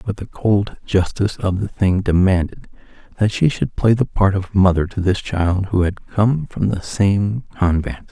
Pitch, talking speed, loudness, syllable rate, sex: 100 Hz, 190 wpm, -18 LUFS, 4.4 syllables/s, male